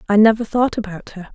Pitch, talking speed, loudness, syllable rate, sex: 210 Hz, 225 wpm, -17 LUFS, 6.1 syllables/s, female